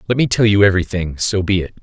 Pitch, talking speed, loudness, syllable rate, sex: 100 Hz, 260 wpm, -16 LUFS, 7.0 syllables/s, male